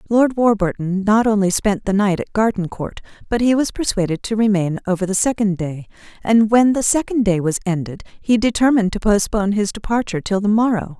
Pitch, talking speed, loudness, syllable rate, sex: 205 Hz, 190 wpm, -18 LUFS, 5.6 syllables/s, female